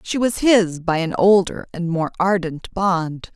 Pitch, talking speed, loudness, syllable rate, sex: 185 Hz, 180 wpm, -19 LUFS, 3.9 syllables/s, female